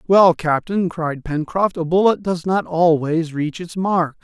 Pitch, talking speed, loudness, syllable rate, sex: 170 Hz, 170 wpm, -19 LUFS, 3.9 syllables/s, male